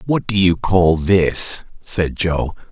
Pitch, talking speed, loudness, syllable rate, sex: 90 Hz, 155 wpm, -17 LUFS, 3.1 syllables/s, male